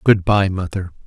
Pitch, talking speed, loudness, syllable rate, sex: 95 Hz, 170 wpm, -18 LUFS, 4.7 syllables/s, male